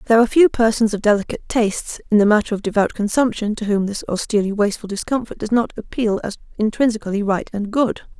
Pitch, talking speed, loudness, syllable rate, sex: 215 Hz, 200 wpm, -19 LUFS, 6.7 syllables/s, female